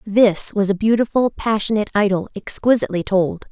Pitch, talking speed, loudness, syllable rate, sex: 205 Hz, 135 wpm, -18 LUFS, 5.9 syllables/s, female